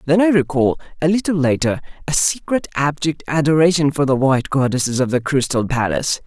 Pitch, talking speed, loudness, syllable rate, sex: 145 Hz, 170 wpm, -18 LUFS, 5.8 syllables/s, male